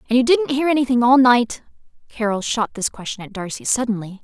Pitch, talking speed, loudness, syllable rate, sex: 240 Hz, 200 wpm, -19 LUFS, 5.8 syllables/s, female